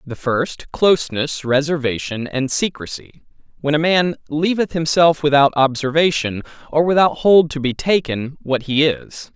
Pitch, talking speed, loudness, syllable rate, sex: 145 Hz, 140 wpm, -17 LUFS, 4.4 syllables/s, male